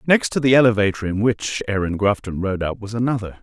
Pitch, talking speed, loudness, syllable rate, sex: 110 Hz, 210 wpm, -20 LUFS, 5.9 syllables/s, male